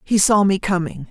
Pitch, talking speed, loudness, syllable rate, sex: 185 Hz, 215 wpm, -17 LUFS, 5.0 syllables/s, female